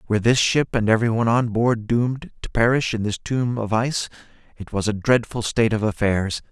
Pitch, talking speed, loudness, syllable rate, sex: 115 Hz, 205 wpm, -21 LUFS, 5.7 syllables/s, male